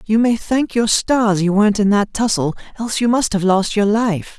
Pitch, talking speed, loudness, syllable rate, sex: 210 Hz, 230 wpm, -16 LUFS, 5.0 syllables/s, male